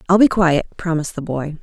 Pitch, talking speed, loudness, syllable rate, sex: 165 Hz, 220 wpm, -18 LUFS, 6.2 syllables/s, female